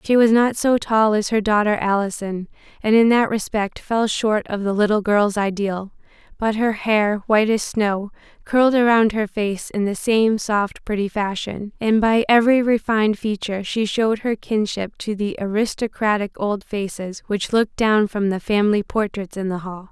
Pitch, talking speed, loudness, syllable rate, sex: 210 Hz, 180 wpm, -20 LUFS, 4.8 syllables/s, female